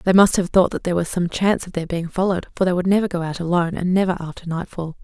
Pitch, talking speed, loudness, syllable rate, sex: 180 Hz, 285 wpm, -20 LUFS, 7.2 syllables/s, female